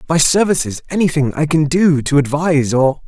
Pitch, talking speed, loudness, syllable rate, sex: 150 Hz, 155 wpm, -15 LUFS, 5.4 syllables/s, male